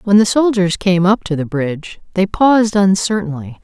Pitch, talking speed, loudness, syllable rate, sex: 190 Hz, 180 wpm, -15 LUFS, 5.0 syllables/s, female